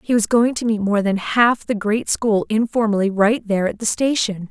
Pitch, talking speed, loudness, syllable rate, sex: 215 Hz, 225 wpm, -18 LUFS, 5.0 syllables/s, female